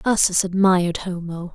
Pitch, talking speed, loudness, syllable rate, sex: 180 Hz, 115 wpm, -19 LUFS, 5.0 syllables/s, female